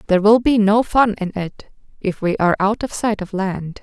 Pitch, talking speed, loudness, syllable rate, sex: 205 Hz, 220 wpm, -18 LUFS, 5.2 syllables/s, female